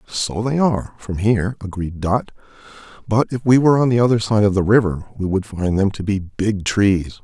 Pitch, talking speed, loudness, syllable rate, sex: 105 Hz, 215 wpm, -18 LUFS, 5.3 syllables/s, male